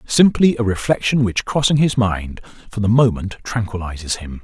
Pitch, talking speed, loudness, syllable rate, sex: 110 Hz, 160 wpm, -18 LUFS, 5.1 syllables/s, male